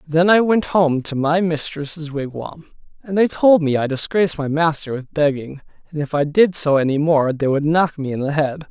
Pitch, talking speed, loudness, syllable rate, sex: 155 Hz, 220 wpm, -18 LUFS, 4.9 syllables/s, male